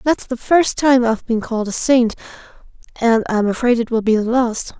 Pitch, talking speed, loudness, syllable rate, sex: 240 Hz, 215 wpm, -17 LUFS, 5.3 syllables/s, female